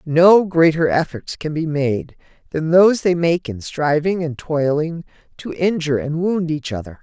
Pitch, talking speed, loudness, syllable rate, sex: 160 Hz, 170 wpm, -18 LUFS, 4.5 syllables/s, female